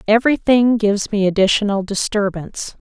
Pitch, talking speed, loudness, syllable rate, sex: 210 Hz, 125 wpm, -17 LUFS, 5.7 syllables/s, female